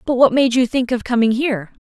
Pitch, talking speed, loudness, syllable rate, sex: 245 Hz, 260 wpm, -17 LUFS, 6.1 syllables/s, female